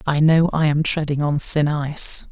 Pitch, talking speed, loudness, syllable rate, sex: 150 Hz, 205 wpm, -19 LUFS, 4.7 syllables/s, male